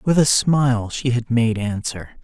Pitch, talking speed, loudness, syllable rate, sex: 120 Hz, 190 wpm, -19 LUFS, 4.2 syllables/s, male